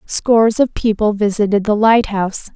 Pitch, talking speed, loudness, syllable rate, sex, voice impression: 210 Hz, 140 wpm, -15 LUFS, 5.0 syllables/s, female, very feminine, young, very thin, tensed, slightly weak, bright, soft, clear, slightly fluent, cute, intellectual, refreshing, sincere, very calm, friendly, reassuring, unique, elegant, slightly wild, very sweet, slightly lively, very kind, modest